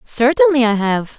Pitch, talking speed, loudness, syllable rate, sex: 250 Hz, 150 wpm, -14 LUFS, 4.4 syllables/s, female